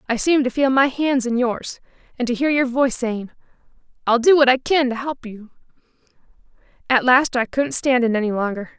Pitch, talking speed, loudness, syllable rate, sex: 250 Hz, 205 wpm, -19 LUFS, 5.5 syllables/s, female